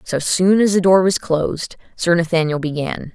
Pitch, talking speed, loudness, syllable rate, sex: 170 Hz, 190 wpm, -17 LUFS, 4.9 syllables/s, female